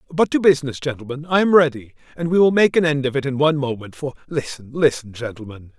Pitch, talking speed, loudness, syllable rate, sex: 145 Hz, 230 wpm, -19 LUFS, 6.6 syllables/s, male